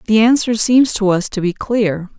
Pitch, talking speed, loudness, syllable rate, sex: 210 Hz, 220 wpm, -15 LUFS, 4.6 syllables/s, female